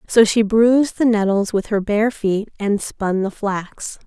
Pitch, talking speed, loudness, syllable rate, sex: 210 Hz, 190 wpm, -18 LUFS, 4.0 syllables/s, female